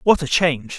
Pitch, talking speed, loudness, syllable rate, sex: 155 Hz, 230 wpm, -18 LUFS, 5.8 syllables/s, male